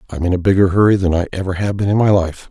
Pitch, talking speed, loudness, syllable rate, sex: 95 Hz, 310 wpm, -15 LUFS, 7.0 syllables/s, male